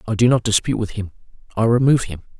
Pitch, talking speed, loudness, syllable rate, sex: 110 Hz, 225 wpm, -18 LUFS, 7.8 syllables/s, male